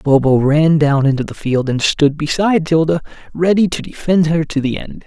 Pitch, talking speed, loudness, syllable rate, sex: 155 Hz, 200 wpm, -15 LUFS, 5.2 syllables/s, male